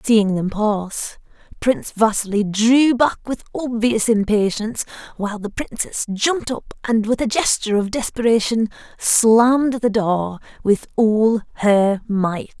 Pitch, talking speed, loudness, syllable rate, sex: 220 Hz, 135 wpm, -19 LUFS, 4.2 syllables/s, female